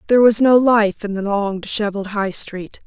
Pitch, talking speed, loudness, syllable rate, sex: 210 Hz, 210 wpm, -17 LUFS, 5.3 syllables/s, female